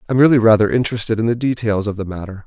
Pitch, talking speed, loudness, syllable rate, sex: 110 Hz, 270 wpm, -16 LUFS, 7.9 syllables/s, male